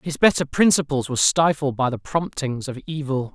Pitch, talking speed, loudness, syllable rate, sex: 145 Hz, 180 wpm, -21 LUFS, 5.3 syllables/s, male